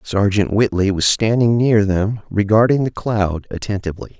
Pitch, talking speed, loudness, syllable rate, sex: 105 Hz, 145 wpm, -17 LUFS, 4.8 syllables/s, male